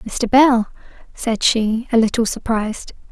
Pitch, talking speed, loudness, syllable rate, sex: 230 Hz, 135 wpm, -17 LUFS, 4.1 syllables/s, female